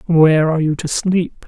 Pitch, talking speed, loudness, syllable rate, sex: 165 Hz, 205 wpm, -16 LUFS, 5.3 syllables/s, female